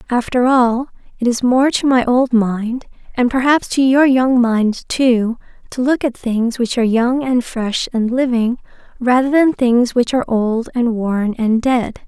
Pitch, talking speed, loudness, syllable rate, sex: 245 Hz, 185 wpm, -16 LUFS, 4.2 syllables/s, female